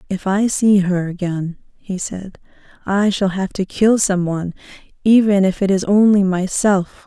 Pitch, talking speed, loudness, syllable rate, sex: 195 Hz, 170 wpm, -17 LUFS, 4.4 syllables/s, female